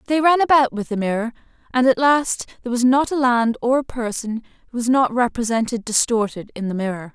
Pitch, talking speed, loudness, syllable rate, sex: 240 Hz, 210 wpm, -19 LUFS, 5.8 syllables/s, female